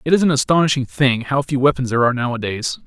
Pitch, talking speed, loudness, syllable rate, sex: 135 Hz, 230 wpm, -18 LUFS, 7.0 syllables/s, male